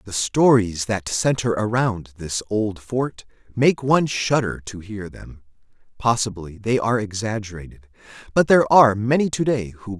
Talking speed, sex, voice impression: 155 wpm, male, very masculine, middle-aged, very thick, very tensed, very powerful, bright, soft, very clear, very fluent, slightly raspy, very cool, intellectual, refreshing, sincere, very calm, very mature, very friendly, reassuring, very unique, slightly elegant, wild, sweet, lively, very kind, slightly intense